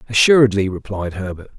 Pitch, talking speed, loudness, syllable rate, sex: 105 Hz, 115 wpm, -16 LUFS, 6.0 syllables/s, male